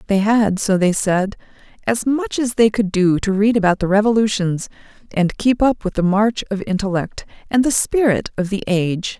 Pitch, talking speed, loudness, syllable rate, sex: 205 Hz, 195 wpm, -18 LUFS, 5.0 syllables/s, female